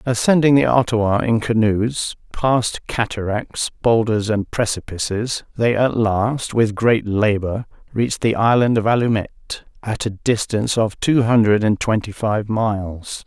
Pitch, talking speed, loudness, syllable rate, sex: 110 Hz, 140 wpm, -19 LUFS, 4.3 syllables/s, male